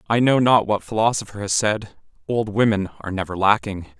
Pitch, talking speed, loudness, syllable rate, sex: 105 Hz, 180 wpm, -20 LUFS, 5.5 syllables/s, male